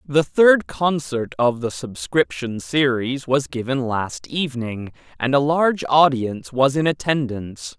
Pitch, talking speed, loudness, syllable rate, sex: 135 Hz, 140 wpm, -20 LUFS, 4.2 syllables/s, male